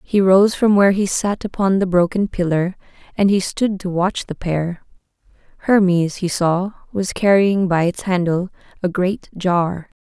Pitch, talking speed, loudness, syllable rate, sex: 185 Hz, 170 wpm, -18 LUFS, 4.3 syllables/s, female